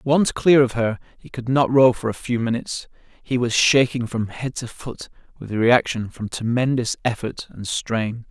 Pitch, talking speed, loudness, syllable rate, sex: 120 Hz, 195 wpm, -21 LUFS, 4.6 syllables/s, male